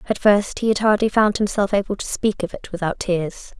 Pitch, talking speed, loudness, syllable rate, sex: 200 Hz, 235 wpm, -20 LUFS, 5.3 syllables/s, female